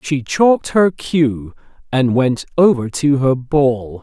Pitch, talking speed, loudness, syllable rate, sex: 135 Hz, 150 wpm, -15 LUFS, 3.5 syllables/s, male